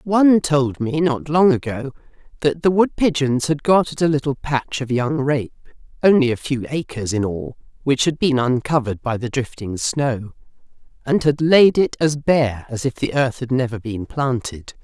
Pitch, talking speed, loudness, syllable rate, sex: 135 Hz, 185 wpm, -19 LUFS, 4.7 syllables/s, female